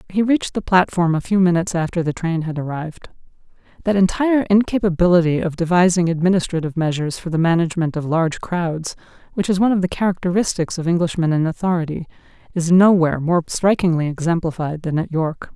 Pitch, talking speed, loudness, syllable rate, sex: 175 Hz, 165 wpm, -18 LUFS, 6.4 syllables/s, female